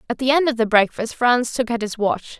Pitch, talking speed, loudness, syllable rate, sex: 240 Hz, 275 wpm, -19 LUFS, 5.4 syllables/s, female